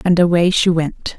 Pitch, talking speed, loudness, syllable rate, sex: 170 Hz, 200 wpm, -15 LUFS, 4.6 syllables/s, female